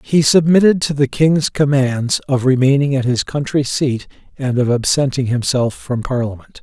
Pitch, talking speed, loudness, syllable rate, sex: 135 Hz, 165 wpm, -16 LUFS, 4.7 syllables/s, male